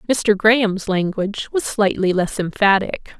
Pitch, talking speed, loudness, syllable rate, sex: 205 Hz, 130 wpm, -18 LUFS, 4.4 syllables/s, female